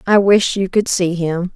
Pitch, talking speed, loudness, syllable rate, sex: 190 Hz, 230 wpm, -16 LUFS, 4.3 syllables/s, female